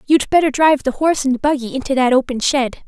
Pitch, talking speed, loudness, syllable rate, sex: 270 Hz, 230 wpm, -16 LUFS, 6.4 syllables/s, female